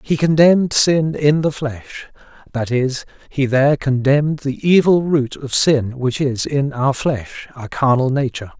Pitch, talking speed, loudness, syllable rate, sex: 135 Hz, 160 wpm, -17 LUFS, 4.3 syllables/s, male